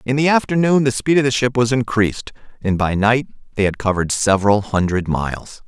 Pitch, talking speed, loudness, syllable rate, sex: 115 Hz, 200 wpm, -17 LUFS, 5.8 syllables/s, male